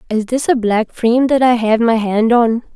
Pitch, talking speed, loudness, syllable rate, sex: 235 Hz, 240 wpm, -14 LUFS, 4.9 syllables/s, female